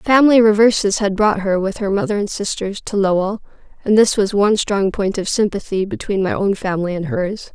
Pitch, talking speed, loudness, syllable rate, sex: 205 Hz, 205 wpm, -17 LUFS, 5.5 syllables/s, female